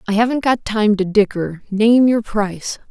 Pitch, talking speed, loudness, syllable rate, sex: 210 Hz, 165 wpm, -17 LUFS, 4.7 syllables/s, female